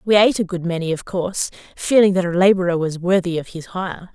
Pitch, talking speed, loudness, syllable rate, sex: 180 Hz, 230 wpm, -19 LUFS, 6.1 syllables/s, female